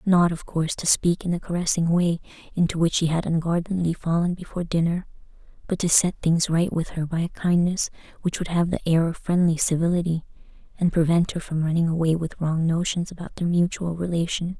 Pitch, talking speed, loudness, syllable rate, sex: 170 Hz, 195 wpm, -23 LUFS, 5.8 syllables/s, female